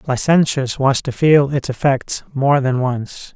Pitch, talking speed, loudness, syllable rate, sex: 135 Hz, 160 wpm, -16 LUFS, 3.8 syllables/s, male